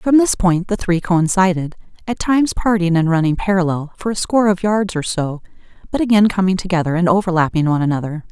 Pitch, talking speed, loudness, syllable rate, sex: 185 Hz, 190 wpm, -17 LUFS, 6.1 syllables/s, female